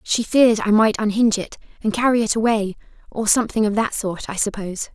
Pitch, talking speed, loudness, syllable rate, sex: 215 Hz, 205 wpm, -19 LUFS, 6.1 syllables/s, female